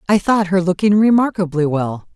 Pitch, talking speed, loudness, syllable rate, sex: 185 Hz, 165 wpm, -16 LUFS, 5.2 syllables/s, female